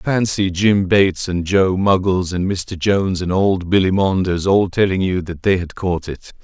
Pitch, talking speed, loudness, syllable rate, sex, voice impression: 95 Hz, 195 wpm, -17 LUFS, 4.4 syllables/s, male, very masculine, adult-like, middle-aged, thick, tensed, slightly weak, slightly dark, soft, slightly muffled, slightly fluent, slightly raspy, cool, intellectual, slightly refreshing, sincere, calm, mature, friendly, reassuring, unique, slightly elegant, wild, slightly sweet, lively, kind, slightly modest